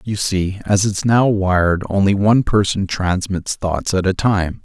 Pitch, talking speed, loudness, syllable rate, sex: 100 Hz, 195 wpm, -17 LUFS, 4.5 syllables/s, male